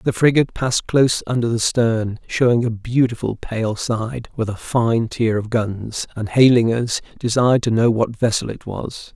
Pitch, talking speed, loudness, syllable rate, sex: 115 Hz, 185 wpm, -19 LUFS, 4.6 syllables/s, male